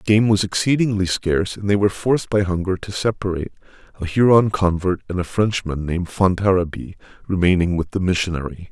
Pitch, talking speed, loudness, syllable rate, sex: 95 Hz, 165 wpm, -19 LUFS, 6.0 syllables/s, male